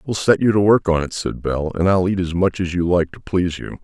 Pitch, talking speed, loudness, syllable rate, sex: 90 Hz, 315 wpm, -19 LUFS, 5.8 syllables/s, male